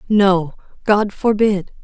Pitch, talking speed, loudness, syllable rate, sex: 200 Hz, 100 wpm, -16 LUFS, 3.1 syllables/s, female